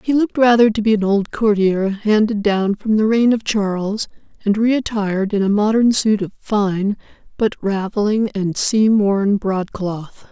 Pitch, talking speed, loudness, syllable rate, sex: 210 Hz, 175 wpm, -17 LUFS, 4.4 syllables/s, female